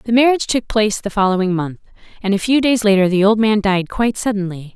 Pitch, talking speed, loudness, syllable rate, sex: 210 Hz, 225 wpm, -16 LUFS, 6.4 syllables/s, female